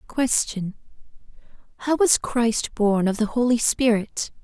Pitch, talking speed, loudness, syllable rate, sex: 230 Hz, 110 wpm, -21 LUFS, 3.9 syllables/s, female